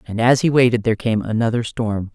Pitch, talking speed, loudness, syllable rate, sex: 115 Hz, 225 wpm, -18 LUFS, 6.0 syllables/s, female